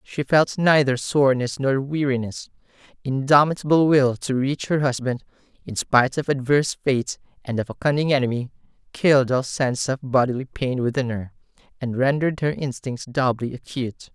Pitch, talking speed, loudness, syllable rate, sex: 135 Hz, 155 wpm, -22 LUFS, 5.3 syllables/s, male